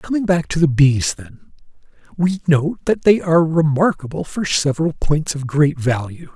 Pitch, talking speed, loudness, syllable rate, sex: 155 Hz, 170 wpm, -17 LUFS, 4.8 syllables/s, male